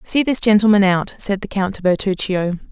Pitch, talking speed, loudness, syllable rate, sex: 200 Hz, 200 wpm, -17 LUFS, 5.3 syllables/s, female